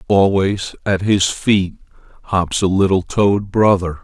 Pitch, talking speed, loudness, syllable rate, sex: 95 Hz, 135 wpm, -16 LUFS, 3.8 syllables/s, male